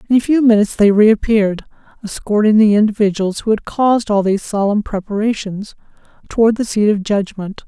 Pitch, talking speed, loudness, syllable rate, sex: 210 Hz, 165 wpm, -15 LUFS, 5.8 syllables/s, female